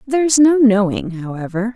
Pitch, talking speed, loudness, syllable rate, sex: 225 Hz, 135 wpm, -15 LUFS, 5.0 syllables/s, female